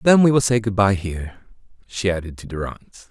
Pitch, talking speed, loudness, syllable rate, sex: 100 Hz, 210 wpm, -20 LUFS, 5.8 syllables/s, male